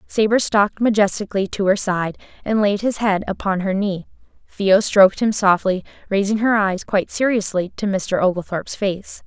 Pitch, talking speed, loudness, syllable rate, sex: 200 Hz, 170 wpm, -19 LUFS, 5.2 syllables/s, female